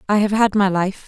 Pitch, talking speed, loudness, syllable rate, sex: 200 Hz, 280 wpm, -17 LUFS, 5.6 syllables/s, female